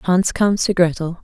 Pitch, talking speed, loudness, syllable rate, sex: 180 Hz, 195 wpm, -17 LUFS, 5.2 syllables/s, female